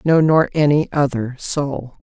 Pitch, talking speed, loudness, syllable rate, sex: 145 Hz, 150 wpm, -17 LUFS, 3.9 syllables/s, female